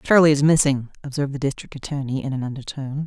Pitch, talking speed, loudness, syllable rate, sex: 140 Hz, 195 wpm, -21 LUFS, 7.1 syllables/s, female